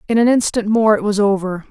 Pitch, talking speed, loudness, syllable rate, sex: 210 Hz, 245 wpm, -16 LUFS, 6.0 syllables/s, female